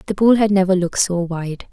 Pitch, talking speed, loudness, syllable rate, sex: 190 Hz, 245 wpm, -17 LUFS, 5.9 syllables/s, female